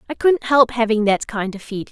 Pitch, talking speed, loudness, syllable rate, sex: 235 Hz, 250 wpm, -18 LUFS, 5.2 syllables/s, female